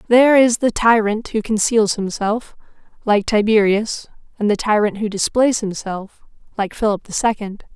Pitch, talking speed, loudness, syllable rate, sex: 215 Hz, 145 wpm, -17 LUFS, 4.7 syllables/s, female